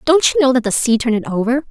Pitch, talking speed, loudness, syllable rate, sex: 245 Hz, 315 wpm, -15 LUFS, 7.0 syllables/s, female